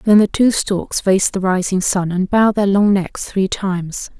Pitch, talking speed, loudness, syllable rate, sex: 195 Hz, 215 wpm, -16 LUFS, 4.6 syllables/s, female